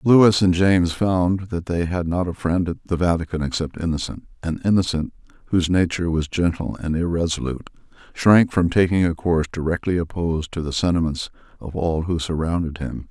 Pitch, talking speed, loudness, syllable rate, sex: 85 Hz, 175 wpm, -21 LUFS, 5.6 syllables/s, male